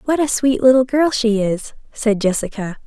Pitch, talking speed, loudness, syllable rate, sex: 235 Hz, 190 wpm, -17 LUFS, 4.8 syllables/s, female